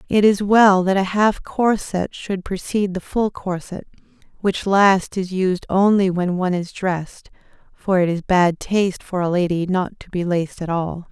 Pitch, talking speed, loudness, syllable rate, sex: 185 Hz, 190 wpm, -19 LUFS, 4.5 syllables/s, female